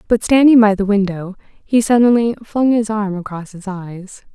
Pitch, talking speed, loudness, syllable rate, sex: 210 Hz, 180 wpm, -14 LUFS, 4.7 syllables/s, female